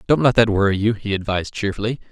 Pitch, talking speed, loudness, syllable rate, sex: 105 Hz, 225 wpm, -19 LUFS, 6.9 syllables/s, male